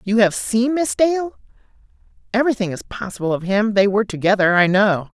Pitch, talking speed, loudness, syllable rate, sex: 215 Hz, 175 wpm, -18 LUFS, 5.6 syllables/s, female